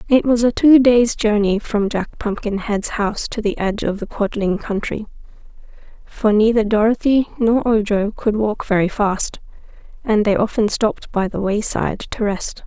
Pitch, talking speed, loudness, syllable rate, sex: 215 Hz, 165 wpm, -18 LUFS, 4.8 syllables/s, female